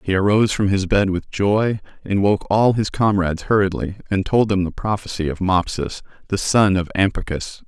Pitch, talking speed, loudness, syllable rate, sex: 100 Hz, 195 wpm, -19 LUFS, 5.3 syllables/s, male